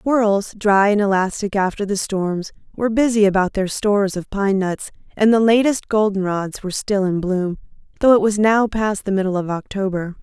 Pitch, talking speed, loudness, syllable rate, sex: 200 Hz, 190 wpm, -18 LUFS, 5.1 syllables/s, female